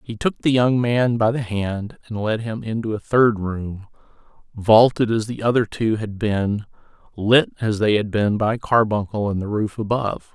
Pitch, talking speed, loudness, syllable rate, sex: 110 Hz, 190 wpm, -20 LUFS, 4.7 syllables/s, male